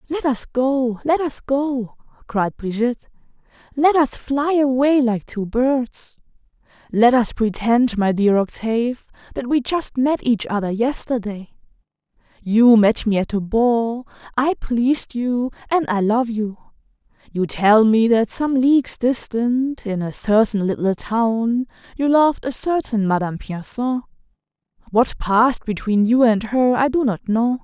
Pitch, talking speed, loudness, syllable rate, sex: 240 Hz, 150 wpm, -19 LUFS, 4.1 syllables/s, female